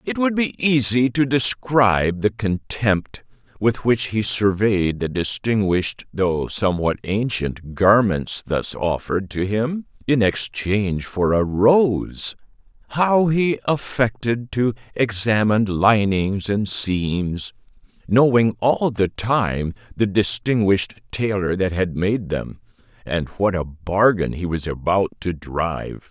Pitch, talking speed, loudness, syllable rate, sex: 105 Hz, 120 wpm, -20 LUFS, 3.7 syllables/s, male